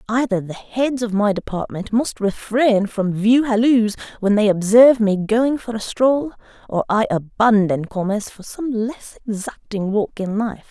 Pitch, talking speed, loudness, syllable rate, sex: 220 Hz, 170 wpm, -19 LUFS, 4.4 syllables/s, female